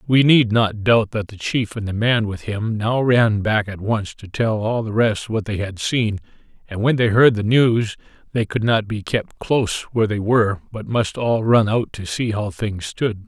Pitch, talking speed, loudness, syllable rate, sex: 110 Hz, 230 wpm, -19 LUFS, 4.5 syllables/s, male